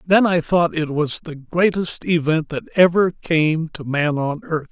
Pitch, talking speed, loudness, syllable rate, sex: 160 Hz, 190 wpm, -19 LUFS, 4.0 syllables/s, male